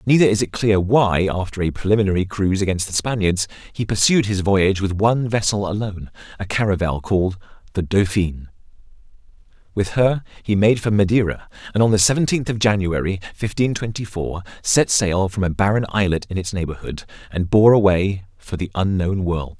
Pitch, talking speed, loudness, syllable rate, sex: 100 Hz, 170 wpm, -19 LUFS, 5.6 syllables/s, male